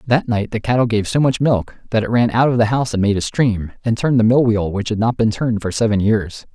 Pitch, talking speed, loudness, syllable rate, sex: 115 Hz, 295 wpm, -17 LUFS, 6.0 syllables/s, male